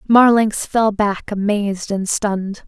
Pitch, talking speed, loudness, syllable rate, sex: 205 Hz, 135 wpm, -17 LUFS, 4.0 syllables/s, female